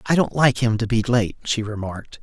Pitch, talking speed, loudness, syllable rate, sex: 115 Hz, 245 wpm, -21 LUFS, 5.4 syllables/s, male